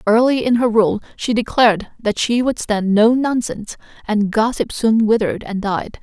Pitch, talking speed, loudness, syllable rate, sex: 225 Hz, 180 wpm, -17 LUFS, 4.8 syllables/s, female